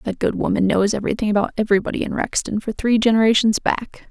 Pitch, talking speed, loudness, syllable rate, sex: 215 Hz, 190 wpm, -19 LUFS, 6.6 syllables/s, female